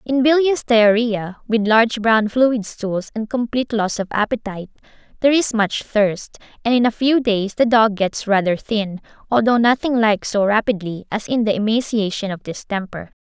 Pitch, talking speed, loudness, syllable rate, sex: 220 Hz, 170 wpm, -18 LUFS, 4.9 syllables/s, female